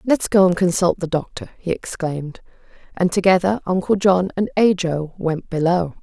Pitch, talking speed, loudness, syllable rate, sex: 180 Hz, 160 wpm, -19 LUFS, 4.9 syllables/s, female